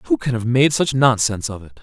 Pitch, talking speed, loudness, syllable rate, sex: 110 Hz, 265 wpm, -18 LUFS, 5.6 syllables/s, male